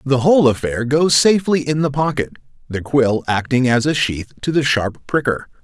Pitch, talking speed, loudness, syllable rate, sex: 135 Hz, 190 wpm, -17 LUFS, 5.1 syllables/s, male